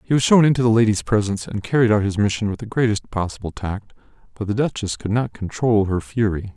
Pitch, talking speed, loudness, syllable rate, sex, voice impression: 110 Hz, 230 wpm, -20 LUFS, 6.1 syllables/s, male, masculine, adult-like, thick, slightly relaxed, soft, muffled, raspy, calm, slightly mature, friendly, reassuring, wild, kind, modest